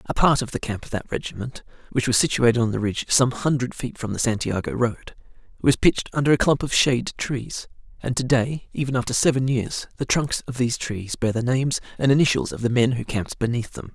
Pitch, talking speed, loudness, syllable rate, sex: 125 Hz, 230 wpm, -23 LUFS, 5.9 syllables/s, male